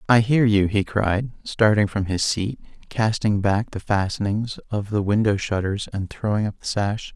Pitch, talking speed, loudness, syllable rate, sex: 105 Hz, 185 wpm, -22 LUFS, 4.5 syllables/s, male